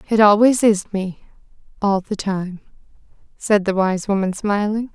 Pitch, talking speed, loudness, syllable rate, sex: 200 Hz, 145 wpm, -18 LUFS, 4.4 syllables/s, female